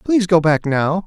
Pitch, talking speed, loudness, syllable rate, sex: 175 Hz, 225 wpm, -16 LUFS, 5.2 syllables/s, male